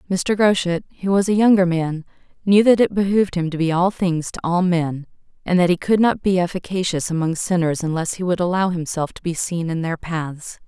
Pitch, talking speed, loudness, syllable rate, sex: 175 Hz, 220 wpm, -19 LUFS, 5.4 syllables/s, female